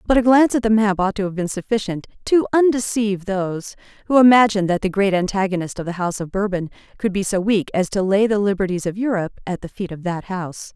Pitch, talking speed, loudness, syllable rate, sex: 200 Hz, 235 wpm, -19 LUFS, 6.5 syllables/s, female